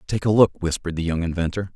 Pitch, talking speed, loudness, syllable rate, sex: 90 Hz, 240 wpm, -22 LUFS, 6.8 syllables/s, male